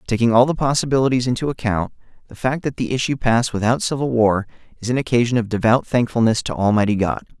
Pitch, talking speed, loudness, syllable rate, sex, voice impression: 120 Hz, 195 wpm, -19 LUFS, 6.5 syllables/s, male, very masculine, adult-like, slightly middle-aged, thick, tensed, slightly powerful, bright, hard, very soft, slightly muffled, fluent, slightly raspy, cool, very intellectual, slightly refreshing, very sincere, very calm, mature, very friendly, very reassuring, unique, elegant, slightly wild, sweet, slightly lively, very kind, modest